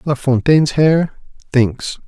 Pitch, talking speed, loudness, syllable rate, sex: 140 Hz, 115 wpm, -15 LUFS, 3.7 syllables/s, male